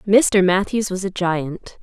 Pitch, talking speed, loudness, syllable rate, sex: 190 Hz, 165 wpm, -19 LUFS, 3.4 syllables/s, female